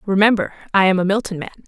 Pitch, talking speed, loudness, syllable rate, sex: 195 Hz, 215 wpm, -17 LUFS, 7.4 syllables/s, female